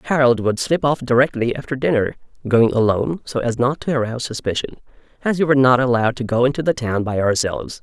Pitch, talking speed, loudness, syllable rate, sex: 125 Hz, 205 wpm, -19 LUFS, 6.4 syllables/s, male